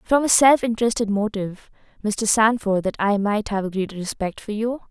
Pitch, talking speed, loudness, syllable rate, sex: 215 Hz, 185 wpm, -21 LUFS, 5.5 syllables/s, female